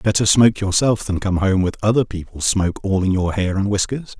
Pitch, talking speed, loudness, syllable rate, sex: 100 Hz, 230 wpm, -18 LUFS, 5.7 syllables/s, male